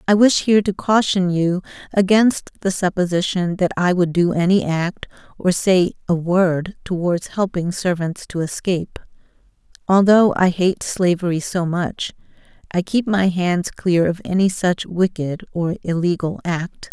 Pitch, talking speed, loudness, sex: 180 Hz, 150 wpm, -19 LUFS, female